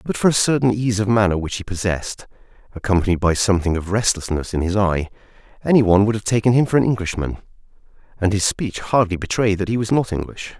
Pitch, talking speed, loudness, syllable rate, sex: 100 Hz, 210 wpm, -19 LUFS, 6.5 syllables/s, male